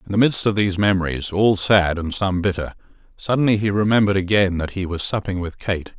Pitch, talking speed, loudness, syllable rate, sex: 95 Hz, 210 wpm, -20 LUFS, 5.9 syllables/s, male